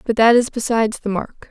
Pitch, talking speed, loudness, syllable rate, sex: 225 Hz, 240 wpm, -17 LUFS, 5.8 syllables/s, female